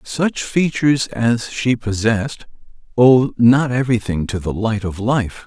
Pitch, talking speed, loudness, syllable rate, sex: 120 Hz, 145 wpm, -17 LUFS, 4.1 syllables/s, male